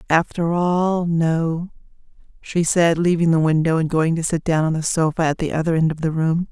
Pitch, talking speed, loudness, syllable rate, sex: 165 Hz, 210 wpm, -19 LUFS, 5.0 syllables/s, female